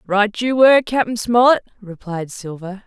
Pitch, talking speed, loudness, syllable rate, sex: 215 Hz, 145 wpm, -16 LUFS, 4.3 syllables/s, female